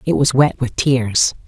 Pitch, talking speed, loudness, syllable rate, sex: 115 Hz, 205 wpm, -16 LUFS, 4.0 syllables/s, female